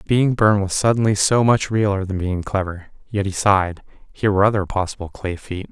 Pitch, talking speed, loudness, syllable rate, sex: 100 Hz, 200 wpm, -19 LUFS, 5.7 syllables/s, male